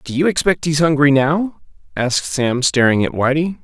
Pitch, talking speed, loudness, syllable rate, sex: 145 Hz, 180 wpm, -16 LUFS, 5.0 syllables/s, male